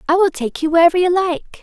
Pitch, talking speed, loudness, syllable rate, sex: 340 Hz, 260 wpm, -16 LUFS, 6.1 syllables/s, female